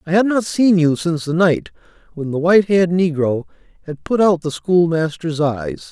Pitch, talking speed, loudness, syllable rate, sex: 170 Hz, 195 wpm, -17 LUFS, 5.1 syllables/s, male